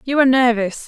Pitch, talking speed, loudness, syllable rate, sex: 245 Hz, 205 wpm, -16 LUFS, 6.5 syllables/s, female